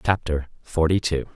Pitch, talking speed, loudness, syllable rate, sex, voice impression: 80 Hz, 135 wpm, -24 LUFS, 4.9 syllables/s, male, masculine, adult-like, thick, fluent, cool, slightly intellectual, calm, slightly elegant